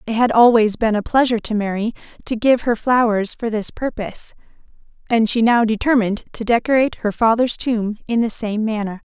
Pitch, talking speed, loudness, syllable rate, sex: 225 Hz, 185 wpm, -18 LUFS, 5.6 syllables/s, female